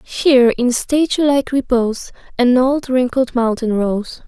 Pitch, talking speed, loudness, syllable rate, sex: 255 Hz, 140 wpm, -16 LUFS, 4.2 syllables/s, female